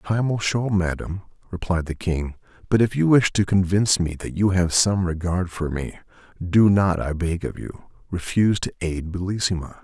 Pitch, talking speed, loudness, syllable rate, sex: 95 Hz, 190 wpm, -22 LUFS, 4.9 syllables/s, male